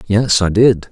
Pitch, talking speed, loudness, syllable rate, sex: 105 Hz, 195 wpm, -13 LUFS, 3.9 syllables/s, male